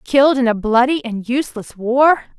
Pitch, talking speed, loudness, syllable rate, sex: 250 Hz, 175 wpm, -16 LUFS, 5.1 syllables/s, female